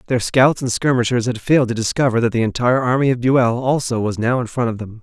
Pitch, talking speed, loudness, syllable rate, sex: 120 Hz, 250 wpm, -17 LUFS, 6.2 syllables/s, male